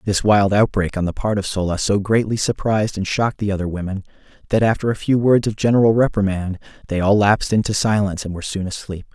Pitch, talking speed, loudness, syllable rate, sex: 100 Hz, 215 wpm, -19 LUFS, 6.3 syllables/s, male